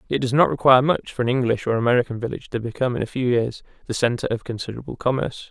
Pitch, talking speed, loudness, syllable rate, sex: 125 Hz, 240 wpm, -22 LUFS, 7.7 syllables/s, male